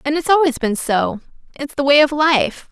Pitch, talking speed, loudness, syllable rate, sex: 280 Hz, 200 wpm, -16 LUFS, 5.0 syllables/s, female